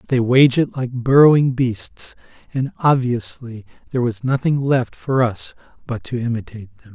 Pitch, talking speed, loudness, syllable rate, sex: 125 Hz, 155 wpm, -18 LUFS, 4.7 syllables/s, male